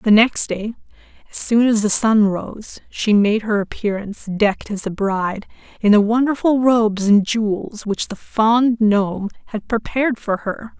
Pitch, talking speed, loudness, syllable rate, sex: 215 Hz, 170 wpm, -18 LUFS, 4.5 syllables/s, female